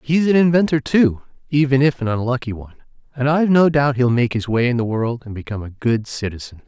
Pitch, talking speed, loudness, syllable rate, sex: 130 Hz, 225 wpm, -18 LUFS, 6.2 syllables/s, male